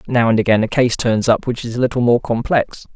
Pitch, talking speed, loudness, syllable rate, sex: 115 Hz, 265 wpm, -16 LUFS, 5.8 syllables/s, male